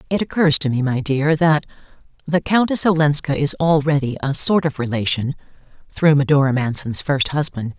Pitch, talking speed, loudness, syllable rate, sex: 145 Hz, 155 wpm, -18 LUFS, 5.2 syllables/s, female